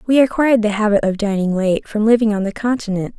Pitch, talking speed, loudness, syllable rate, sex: 215 Hz, 225 wpm, -17 LUFS, 6.2 syllables/s, female